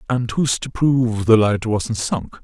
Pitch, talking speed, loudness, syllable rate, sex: 115 Hz, 195 wpm, -18 LUFS, 4.8 syllables/s, male